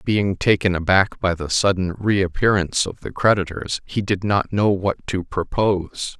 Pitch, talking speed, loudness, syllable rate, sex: 95 Hz, 165 wpm, -20 LUFS, 4.5 syllables/s, male